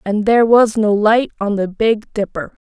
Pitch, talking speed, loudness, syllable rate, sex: 215 Hz, 200 wpm, -15 LUFS, 4.6 syllables/s, female